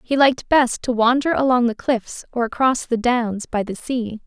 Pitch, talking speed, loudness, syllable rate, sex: 240 Hz, 210 wpm, -19 LUFS, 4.7 syllables/s, female